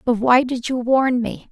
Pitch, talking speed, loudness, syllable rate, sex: 245 Hz, 235 wpm, -18 LUFS, 4.3 syllables/s, female